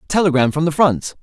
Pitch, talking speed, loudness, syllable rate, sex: 150 Hz, 195 wpm, -16 LUFS, 6.1 syllables/s, male